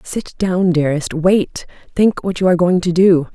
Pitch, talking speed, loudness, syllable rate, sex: 180 Hz, 180 wpm, -15 LUFS, 4.8 syllables/s, female